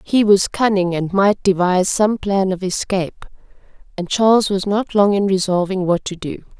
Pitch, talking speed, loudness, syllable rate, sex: 195 Hz, 180 wpm, -17 LUFS, 4.9 syllables/s, female